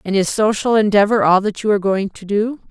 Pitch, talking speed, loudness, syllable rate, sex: 205 Hz, 245 wpm, -16 LUFS, 5.9 syllables/s, female